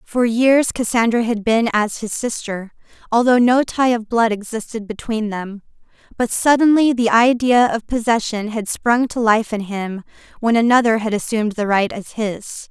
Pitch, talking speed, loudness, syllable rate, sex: 225 Hz, 170 wpm, -17 LUFS, 4.6 syllables/s, female